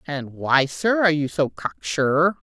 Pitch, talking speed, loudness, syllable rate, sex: 155 Hz, 190 wpm, -21 LUFS, 4.0 syllables/s, female